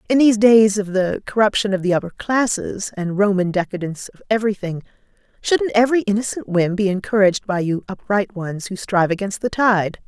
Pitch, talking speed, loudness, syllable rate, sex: 200 Hz, 180 wpm, -19 LUFS, 5.7 syllables/s, female